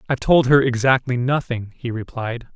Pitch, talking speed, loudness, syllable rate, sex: 125 Hz, 165 wpm, -19 LUFS, 5.2 syllables/s, male